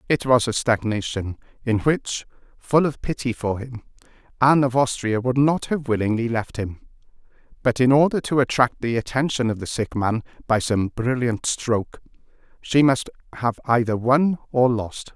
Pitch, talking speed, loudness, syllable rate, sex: 120 Hz, 165 wpm, -22 LUFS, 4.8 syllables/s, male